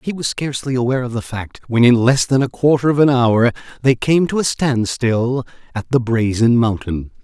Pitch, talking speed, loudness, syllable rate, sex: 125 Hz, 200 wpm, -16 LUFS, 5.2 syllables/s, male